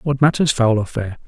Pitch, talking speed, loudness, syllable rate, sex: 125 Hz, 235 wpm, -18 LUFS, 5.1 syllables/s, male